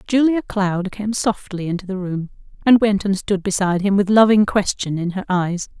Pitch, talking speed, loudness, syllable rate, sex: 195 Hz, 195 wpm, -19 LUFS, 5.0 syllables/s, female